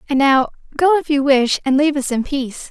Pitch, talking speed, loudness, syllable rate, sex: 280 Hz, 245 wpm, -16 LUFS, 6.0 syllables/s, female